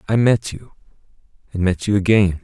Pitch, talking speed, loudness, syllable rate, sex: 100 Hz, 175 wpm, -18 LUFS, 5.3 syllables/s, male